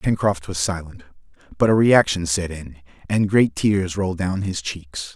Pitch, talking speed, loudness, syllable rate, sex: 90 Hz, 175 wpm, -20 LUFS, 4.5 syllables/s, male